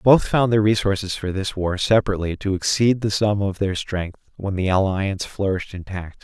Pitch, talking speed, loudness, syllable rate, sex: 100 Hz, 190 wpm, -21 LUFS, 5.4 syllables/s, male